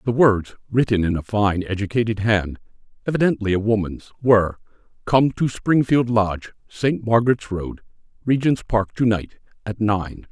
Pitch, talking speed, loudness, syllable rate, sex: 110 Hz, 135 wpm, -20 LUFS, 4.9 syllables/s, male